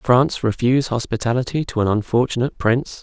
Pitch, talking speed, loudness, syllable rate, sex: 120 Hz, 140 wpm, -19 LUFS, 6.4 syllables/s, male